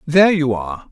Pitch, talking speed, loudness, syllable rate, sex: 140 Hz, 195 wpm, -16 LUFS, 6.4 syllables/s, male